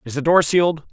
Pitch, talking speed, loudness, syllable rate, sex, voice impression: 150 Hz, 260 wpm, -17 LUFS, 6.3 syllables/s, male, masculine, adult-like, tensed, powerful, bright, soft, clear, cool, intellectual, slightly refreshing, wild, lively, kind, slightly intense